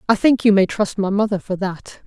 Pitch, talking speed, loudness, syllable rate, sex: 200 Hz, 260 wpm, -18 LUFS, 5.3 syllables/s, female